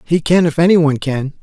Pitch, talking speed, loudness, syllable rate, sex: 155 Hz, 255 wpm, -14 LUFS, 6.3 syllables/s, male